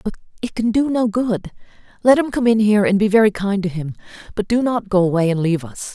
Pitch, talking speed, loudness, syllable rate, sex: 205 Hz, 250 wpm, -18 LUFS, 6.2 syllables/s, female